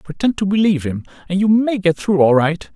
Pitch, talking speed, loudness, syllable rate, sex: 180 Hz, 240 wpm, -16 LUFS, 5.7 syllables/s, male